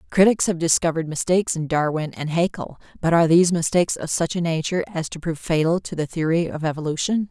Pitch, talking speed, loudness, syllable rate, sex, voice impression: 165 Hz, 205 wpm, -21 LUFS, 6.7 syllables/s, female, very feminine, very adult-like, intellectual, slightly strict